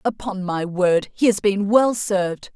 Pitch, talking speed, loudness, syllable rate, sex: 200 Hz, 190 wpm, -20 LUFS, 4.2 syllables/s, female